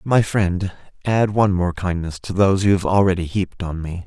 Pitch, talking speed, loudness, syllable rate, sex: 95 Hz, 205 wpm, -20 LUFS, 5.5 syllables/s, male